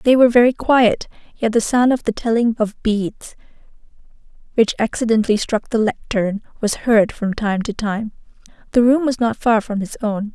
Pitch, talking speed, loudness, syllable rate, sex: 225 Hz, 180 wpm, -18 LUFS, 4.9 syllables/s, female